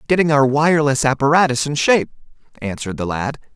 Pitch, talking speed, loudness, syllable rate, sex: 140 Hz, 150 wpm, -17 LUFS, 6.5 syllables/s, male